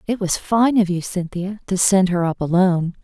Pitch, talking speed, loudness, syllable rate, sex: 185 Hz, 220 wpm, -19 LUFS, 5.1 syllables/s, female